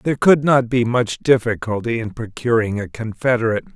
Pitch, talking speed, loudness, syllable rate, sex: 120 Hz, 160 wpm, -18 LUFS, 5.5 syllables/s, male